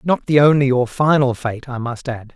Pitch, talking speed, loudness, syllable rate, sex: 130 Hz, 230 wpm, -17 LUFS, 4.9 syllables/s, male